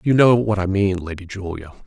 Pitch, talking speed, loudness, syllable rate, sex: 100 Hz, 225 wpm, -19 LUFS, 5.6 syllables/s, male